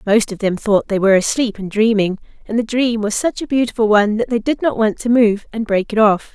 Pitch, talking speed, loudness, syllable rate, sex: 220 Hz, 265 wpm, -16 LUFS, 5.8 syllables/s, female